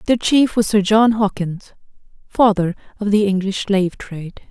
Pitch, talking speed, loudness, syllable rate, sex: 205 Hz, 160 wpm, -17 LUFS, 4.7 syllables/s, female